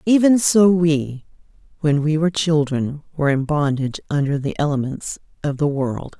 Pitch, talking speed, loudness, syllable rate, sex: 150 Hz, 155 wpm, -19 LUFS, 5.0 syllables/s, female